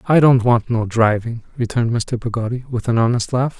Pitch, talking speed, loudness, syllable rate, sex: 120 Hz, 200 wpm, -18 LUFS, 5.4 syllables/s, male